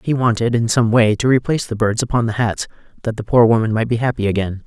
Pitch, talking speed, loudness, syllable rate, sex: 115 Hz, 255 wpm, -17 LUFS, 6.4 syllables/s, male